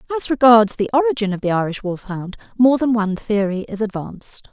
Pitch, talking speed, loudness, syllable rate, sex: 210 Hz, 185 wpm, -18 LUFS, 5.9 syllables/s, female